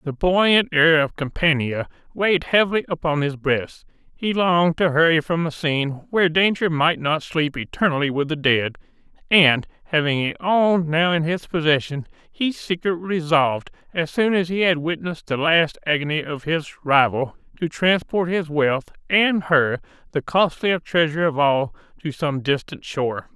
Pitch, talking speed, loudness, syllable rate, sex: 160 Hz, 160 wpm, -20 LUFS, 4.7 syllables/s, male